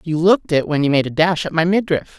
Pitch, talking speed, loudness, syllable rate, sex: 165 Hz, 300 wpm, -17 LUFS, 6.2 syllables/s, female